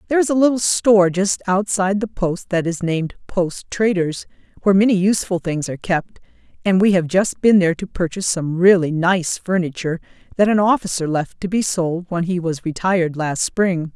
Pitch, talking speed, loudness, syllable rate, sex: 185 Hz, 195 wpm, -18 LUFS, 5.5 syllables/s, female